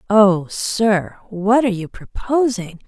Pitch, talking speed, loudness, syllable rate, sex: 205 Hz, 125 wpm, -18 LUFS, 3.6 syllables/s, female